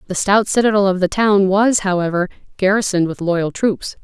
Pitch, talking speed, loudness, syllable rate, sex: 195 Hz, 180 wpm, -16 LUFS, 5.4 syllables/s, female